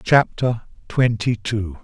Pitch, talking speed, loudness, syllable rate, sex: 115 Hz, 100 wpm, -21 LUFS, 3.4 syllables/s, male